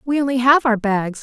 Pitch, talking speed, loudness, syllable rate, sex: 245 Hz, 245 wpm, -17 LUFS, 5.3 syllables/s, female